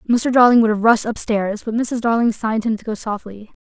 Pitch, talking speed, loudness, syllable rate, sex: 225 Hz, 230 wpm, -18 LUFS, 5.6 syllables/s, female